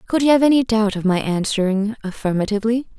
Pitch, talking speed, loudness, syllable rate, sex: 215 Hz, 180 wpm, -18 LUFS, 6.3 syllables/s, female